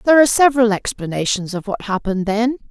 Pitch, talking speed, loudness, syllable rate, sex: 220 Hz, 180 wpm, -17 LUFS, 6.9 syllables/s, female